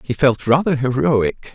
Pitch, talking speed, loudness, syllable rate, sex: 135 Hz, 155 wpm, -17 LUFS, 4.1 syllables/s, male